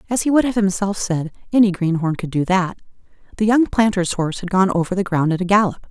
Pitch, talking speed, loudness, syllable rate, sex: 190 Hz, 235 wpm, -18 LUFS, 6.1 syllables/s, female